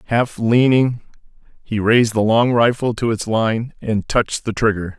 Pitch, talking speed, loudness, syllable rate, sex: 115 Hz, 170 wpm, -17 LUFS, 4.6 syllables/s, male